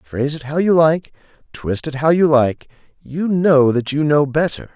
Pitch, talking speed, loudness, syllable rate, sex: 145 Hz, 200 wpm, -16 LUFS, 4.5 syllables/s, male